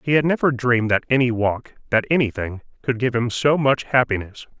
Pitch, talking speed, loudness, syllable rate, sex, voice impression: 125 Hz, 170 wpm, -20 LUFS, 5.5 syllables/s, male, masculine, middle-aged, thick, tensed, powerful, intellectual, sincere, calm, mature, friendly, reassuring, unique, wild